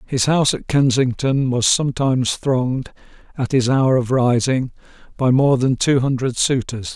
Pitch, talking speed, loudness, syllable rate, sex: 130 Hz, 155 wpm, -18 LUFS, 4.7 syllables/s, male